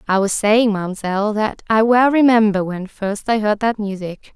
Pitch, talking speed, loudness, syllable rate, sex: 210 Hz, 195 wpm, -17 LUFS, 4.8 syllables/s, female